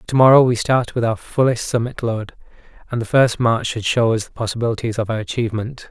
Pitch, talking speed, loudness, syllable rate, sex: 115 Hz, 215 wpm, -18 LUFS, 5.9 syllables/s, male